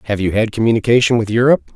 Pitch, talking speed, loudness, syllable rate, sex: 110 Hz, 205 wpm, -15 LUFS, 8.2 syllables/s, male